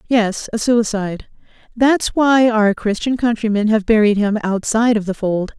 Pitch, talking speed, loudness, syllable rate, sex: 220 Hz, 160 wpm, -16 LUFS, 4.8 syllables/s, female